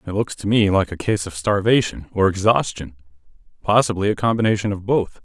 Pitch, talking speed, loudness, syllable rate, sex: 100 Hz, 170 wpm, -19 LUFS, 5.8 syllables/s, male